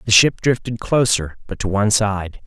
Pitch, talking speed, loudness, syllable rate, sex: 110 Hz, 195 wpm, -18 LUFS, 5.0 syllables/s, male